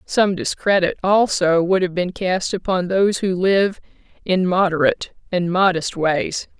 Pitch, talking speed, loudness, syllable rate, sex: 185 Hz, 145 wpm, -19 LUFS, 4.3 syllables/s, female